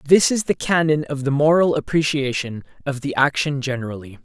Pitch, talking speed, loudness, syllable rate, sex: 145 Hz, 170 wpm, -20 LUFS, 5.4 syllables/s, male